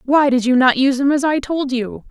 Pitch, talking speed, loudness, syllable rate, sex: 265 Hz, 285 wpm, -16 LUFS, 5.5 syllables/s, female